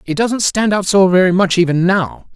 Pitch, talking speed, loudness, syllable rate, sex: 180 Hz, 230 wpm, -13 LUFS, 5.0 syllables/s, male